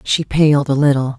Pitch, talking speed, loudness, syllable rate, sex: 140 Hz, 205 wpm, -14 LUFS, 4.6 syllables/s, female